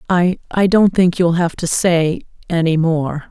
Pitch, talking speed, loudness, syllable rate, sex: 170 Hz, 145 wpm, -16 LUFS, 4.0 syllables/s, female